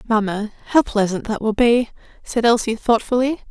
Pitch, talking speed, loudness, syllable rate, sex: 225 Hz, 155 wpm, -19 LUFS, 5.2 syllables/s, female